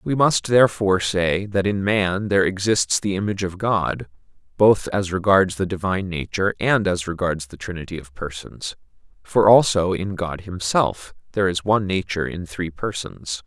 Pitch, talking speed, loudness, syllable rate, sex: 95 Hz, 170 wpm, -21 LUFS, 5.0 syllables/s, male